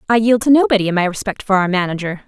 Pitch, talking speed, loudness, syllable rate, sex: 205 Hz, 265 wpm, -16 LUFS, 7.2 syllables/s, female